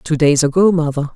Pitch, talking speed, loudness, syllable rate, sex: 155 Hz, 210 wpm, -14 LUFS, 5.9 syllables/s, female